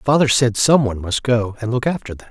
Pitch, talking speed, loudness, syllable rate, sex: 120 Hz, 260 wpm, -18 LUFS, 5.8 syllables/s, male